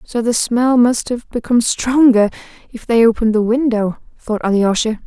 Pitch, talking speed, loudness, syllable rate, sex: 230 Hz, 165 wpm, -15 LUFS, 5.1 syllables/s, female